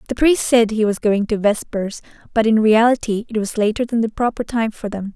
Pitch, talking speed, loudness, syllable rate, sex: 220 Hz, 235 wpm, -18 LUFS, 5.4 syllables/s, female